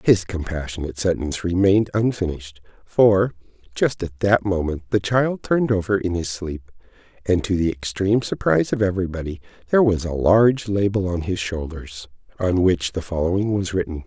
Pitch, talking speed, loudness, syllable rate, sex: 95 Hz, 160 wpm, -21 LUFS, 5.5 syllables/s, male